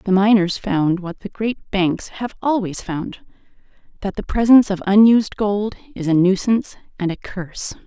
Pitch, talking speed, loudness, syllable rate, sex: 200 Hz, 170 wpm, -19 LUFS, 4.9 syllables/s, female